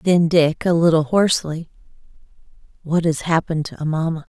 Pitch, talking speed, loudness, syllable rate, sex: 165 Hz, 125 wpm, -19 LUFS, 5.6 syllables/s, female